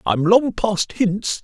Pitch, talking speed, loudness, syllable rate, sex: 205 Hz, 165 wpm, -18 LUFS, 3.2 syllables/s, male